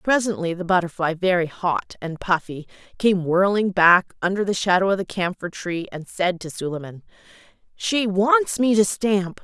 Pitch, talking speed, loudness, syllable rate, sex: 185 Hz, 165 wpm, -21 LUFS, 4.7 syllables/s, female